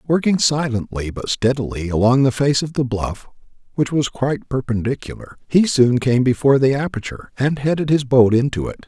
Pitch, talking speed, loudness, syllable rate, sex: 130 Hz, 175 wpm, -18 LUFS, 5.5 syllables/s, male